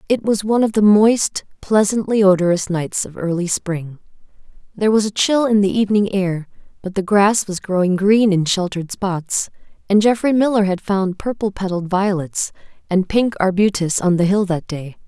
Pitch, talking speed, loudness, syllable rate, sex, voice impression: 195 Hz, 180 wpm, -17 LUFS, 5.1 syllables/s, female, very feminine, very adult-like, very thin, slightly tensed, weak, bright, soft, very clear, slightly halting, slightly raspy, cute, slightly cool, very intellectual, refreshing, very sincere, very calm, very friendly, very reassuring, unique, very elegant, slightly wild, very sweet, lively, very kind, slightly sharp, modest